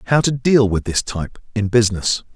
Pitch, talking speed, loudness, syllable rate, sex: 110 Hz, 205 wpm, -18 LUFS, 5.7 syllables/s, male